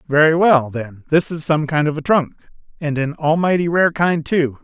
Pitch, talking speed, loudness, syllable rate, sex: 155 Hz, 195 wpm, -17 LUFS, 4.8 syllables/s, male